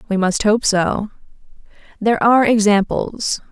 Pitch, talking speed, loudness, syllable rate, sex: 210 Hz, 120 wpm, -16 LUFS, 4.6 syllables/s, female